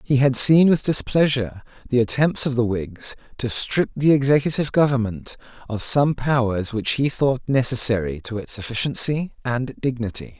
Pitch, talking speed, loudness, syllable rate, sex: 130 Hz, 155 wpm, -21 LUFS, 5.0 syllables/s, male